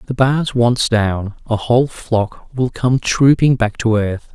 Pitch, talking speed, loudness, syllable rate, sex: 120 Hz, 180 wpm, -16 LUFS, 3.7 syllables/s, male